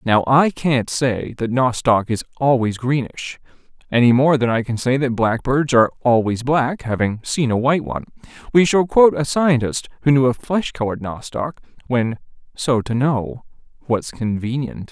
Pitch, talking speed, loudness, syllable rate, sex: 125 Hz, 170 wpm, -18 LUFS, 4.8 syllables/s, male